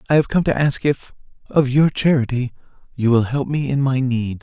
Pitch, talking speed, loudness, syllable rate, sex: 135 Hz, 215 wpm, -19 LUFS, 5.1 syllables/s, male